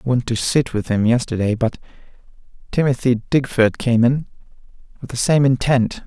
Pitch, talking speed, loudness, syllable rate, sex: 120 Hz, 160 wpm, -18 LUFS, 5.2 syllables/s, male